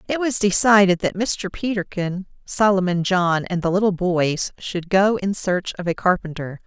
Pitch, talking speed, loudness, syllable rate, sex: 190 Hz, 170 wpm, -20 LUFS, 4.6 syllables/s, female